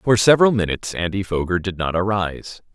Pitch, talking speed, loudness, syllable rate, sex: 95 Hz, 175 wpm, -19 LUFS, 6.1 syllables/s, male